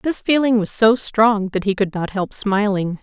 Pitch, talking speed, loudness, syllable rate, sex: 210 Hz, 220 wpm, -18 LUFS, 4.4 syllables/s, female